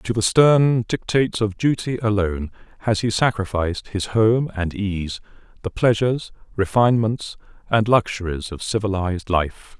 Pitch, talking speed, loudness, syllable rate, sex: 105 Hz, 135 wpm, -20 LUFS, 4.8 syllables/s, male